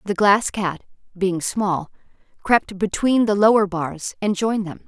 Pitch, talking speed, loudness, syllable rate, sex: 200 Hz, 160 wpm, -20 LUFS, 4.2 syllables/s, female